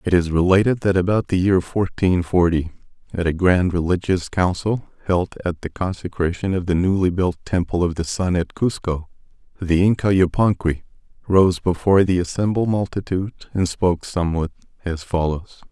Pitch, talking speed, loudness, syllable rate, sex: 90 Hz, 155 wpm, -20 LUFS, 5.2 syllables/s, male